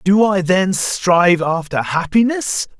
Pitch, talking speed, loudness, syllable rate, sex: 175 Hz, 130 wpm, -16 LUFS, 3.8 syllables/s, male